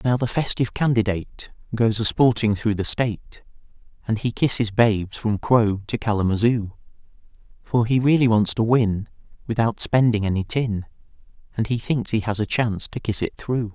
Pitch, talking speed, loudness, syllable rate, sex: 110 Hz, 170 wpm, -21 LUFS, 5.3 syllables/s, male